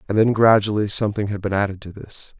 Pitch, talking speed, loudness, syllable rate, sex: 105 Hz, 225 wpm, -19 LUFS, 6.4 syllables/s, male